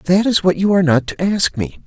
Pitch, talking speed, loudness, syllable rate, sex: 180 Hz, 290 wpm, -16 LUFS, 5.6 syllables/s, male